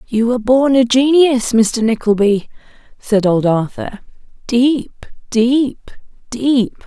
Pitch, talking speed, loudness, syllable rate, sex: 235 Hz, 115 wpm, -14 LUFS, 3.5 syllables/s, female